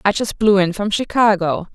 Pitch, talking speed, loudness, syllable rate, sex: 200 Hz, 205 wpm, -17 LUFS, 5.0 syllables/s, female